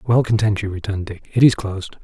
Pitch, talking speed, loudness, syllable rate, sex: 105 Hz, 235 wpm, -19 LUFS, 6.5 syllables/s, male